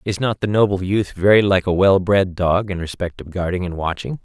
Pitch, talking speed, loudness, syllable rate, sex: 95 Hz, 240 wpm, -18 LUFS, 5.3 syllables/s, male